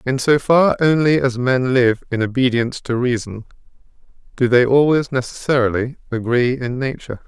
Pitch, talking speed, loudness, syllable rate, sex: 125 Hz, 150 wpm, -17 LUFS, 5.2 syllables/s, male